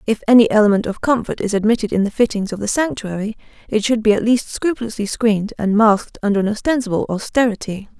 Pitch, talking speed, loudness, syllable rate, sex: 215 Hz, 195 wpm, -17 LUFS, 6.4 syllables/s, female